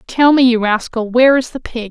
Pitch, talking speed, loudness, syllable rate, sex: 240 Hz, 250 wpm, -13 LUFS, 5.5 syllables/s, female